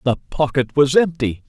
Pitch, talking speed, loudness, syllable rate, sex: 140 Hz, 160 wpm, -18 LUFS, 4.9 syllables/s, male